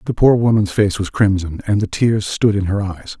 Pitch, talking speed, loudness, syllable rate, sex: 100 Hz, 245 wpm, -17 LUFS, 5.1 syllables/s, male